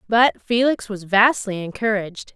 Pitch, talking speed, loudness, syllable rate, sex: 215 Hz, 125 wpm, -19 LUFS, 4.6 syllables/s, female